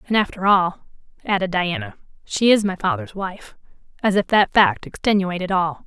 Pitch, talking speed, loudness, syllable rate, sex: 195 Hz, 165 wpm, -20 LUFS, 5.1 syllables/s, female